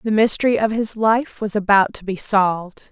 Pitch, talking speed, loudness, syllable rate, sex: 210 Hz, 205 wpm, -18 LUFS, 5.0 syllables/s, female